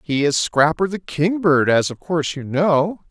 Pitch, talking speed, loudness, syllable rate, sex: 160 Hz, 195 wpm, -18 LUFS, 4.4 syllables/s, male